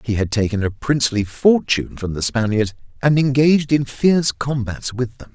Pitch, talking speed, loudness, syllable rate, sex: 125 Hz, 180 wpm, -18 LUFS, 5.2 syllables/s, male